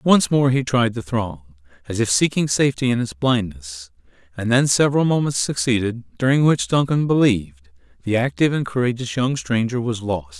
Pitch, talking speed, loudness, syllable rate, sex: 115 Hz, 175 wpm, -19 LUFS, 5.2 syllables/s, male